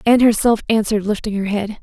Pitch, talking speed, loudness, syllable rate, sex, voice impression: 215 Hz, 200 wpm, -17 LUFS, 6.8 syllables/s, female, very feminine, slightly young, slightly adult-like, thin, slightly tensed, powerful, slightly bright, hard, very clear, very fluent, very cute, slightly cool, intellectual, very refreshing, sincere, slightly calm, slightly friendly, reassuring, very unique, elegant, slightly wild, slightly sweet, lively, slightly kind, slightly intense, light